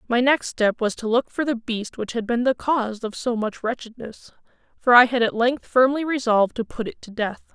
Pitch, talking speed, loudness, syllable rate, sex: 235 Hz, 240 wpm, -22 LUFS, 5.3 syllables/s, female